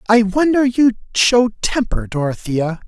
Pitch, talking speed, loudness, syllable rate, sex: 215 Hz, 125 wpm, -16 LUFS, 4.4 syllables/s, male